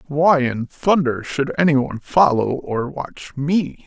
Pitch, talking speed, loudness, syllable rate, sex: 145 Hz, 140 wpm, -19 LUFS, 3.6 syllables/s, male